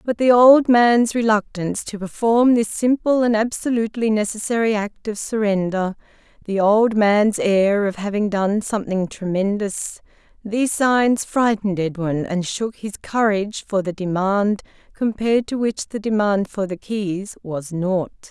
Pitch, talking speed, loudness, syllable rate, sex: 210 Hz, 145 wpm, -19 LUFS, 4.5 syllables/s, female